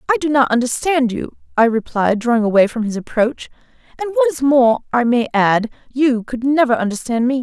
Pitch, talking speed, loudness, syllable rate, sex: 250 Hz, 195 wpm, -16 LUFS, 5.4 syllables/s, female